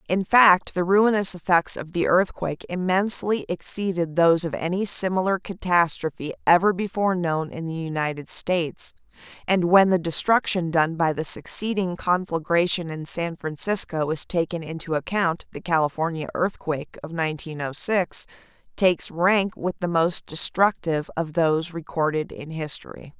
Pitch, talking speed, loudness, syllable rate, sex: 170 Hz, 145 wpm, -22 LUFS, 4.9 syllables/s, female